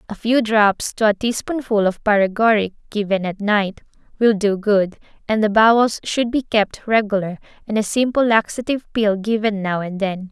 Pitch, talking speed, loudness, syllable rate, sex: 210 Hz, 175 wpm, -18 LUFS, 4.9 syllables/s, female